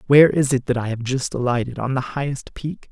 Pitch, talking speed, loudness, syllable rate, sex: 130 Hz, 225 wpm, -21 LUFS, 5.9 syllables/s, male